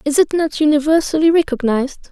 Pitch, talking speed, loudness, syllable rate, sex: 295 Hz, 140 wpm, -15 LUFS, 6.3 syllables/s, female